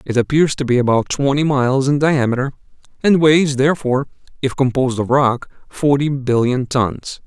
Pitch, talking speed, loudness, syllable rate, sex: 135 Hz, 155 wpm, -16 LUFS, 5.3 syllables/s, male